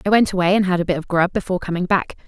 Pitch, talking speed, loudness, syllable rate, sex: 185 Hz, 315 wpm, -19 LUFS, 7.7 syllables/s, female